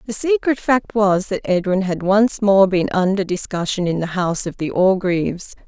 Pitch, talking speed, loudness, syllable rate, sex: 195 Hz, 190 wpm, -18 LUFS, 4.9 syllables/s, female